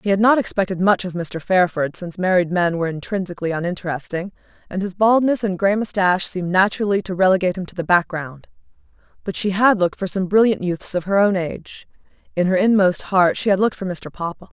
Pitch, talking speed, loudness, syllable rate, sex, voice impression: 185 Hz, 200 wpm, -19 LUFS, 6.3 syllables/s, female, feminine, adult-like, bright, clear, fluent, intellectual, calm, slightly elegant, slightly sharp